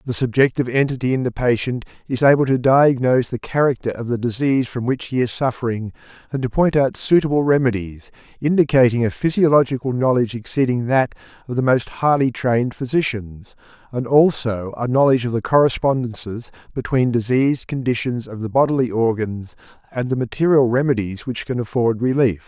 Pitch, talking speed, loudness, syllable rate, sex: 125 Hz, 160 wpm, -19 LUFS, 5.7 syllables/s, male